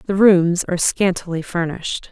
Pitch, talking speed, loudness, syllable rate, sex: 180 Hz, 140 wpm, -18 LUFS, 5.1 syllables/s, female